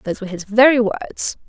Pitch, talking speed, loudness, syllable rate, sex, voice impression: 220 Hz, 205 wpm, -17 LUFS, 8.5 syllables/s, female, feminine, adult-like, thin, relaxed, weak, slightly bright, soft, fluent, slightly intellectual, friendly, elegant, kind, modest